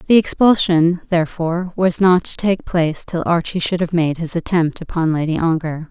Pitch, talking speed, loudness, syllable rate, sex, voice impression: 170 Hz, 185 wpm, -17 LUFS, 5.2 syllables/s, female, feminine, very adult-like, slightly soft, intellectual, calm, elegant